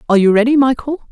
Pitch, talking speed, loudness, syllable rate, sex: 245 Hz, 215 wpm, -13 LUFS, 7.5 syllables/s, female